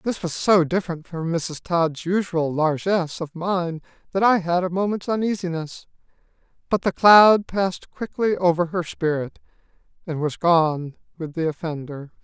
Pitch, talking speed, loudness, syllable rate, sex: 175 Hz, 150 wpm, -22 LUFS, 4.6 syllables/s, male